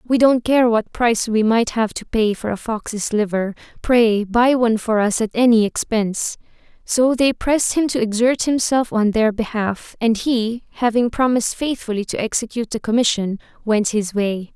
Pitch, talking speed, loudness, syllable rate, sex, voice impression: 225 Hz, 180 wpm, -18 LUFS, 4.8 syllables/s, female, feminine, slightly young, slightly relaxed, powerful, bright, soft, fluent, slightly cute, friendly, reassuring, elegant, lively, kind, slightly modest